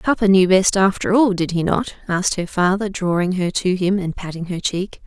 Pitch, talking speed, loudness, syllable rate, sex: 185 Hz, 225 wpm, -18 LUFS, 5.2 syllables/s, female